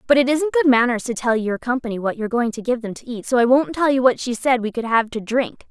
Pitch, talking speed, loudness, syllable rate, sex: 245 Hz, 325 wpm, -19 LUFS, 6.3 syllables/s, female